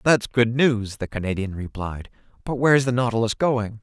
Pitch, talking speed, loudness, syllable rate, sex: 115 Hz, 175 wpm, -22 LUFS, 5.0 syllables/s, male